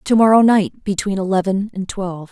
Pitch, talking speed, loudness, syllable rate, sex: 200 Hz, 180 wpm, -17 LUFS, 5.4 syllables/s, female